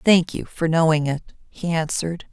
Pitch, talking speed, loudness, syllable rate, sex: 165 Hz, 180 wpm, -22 LUFS, 5.0 syllables/s, female